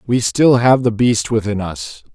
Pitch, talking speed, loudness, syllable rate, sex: 115 Hz, 195 wpm, -15 LUFS, 4.2 syllables/s, male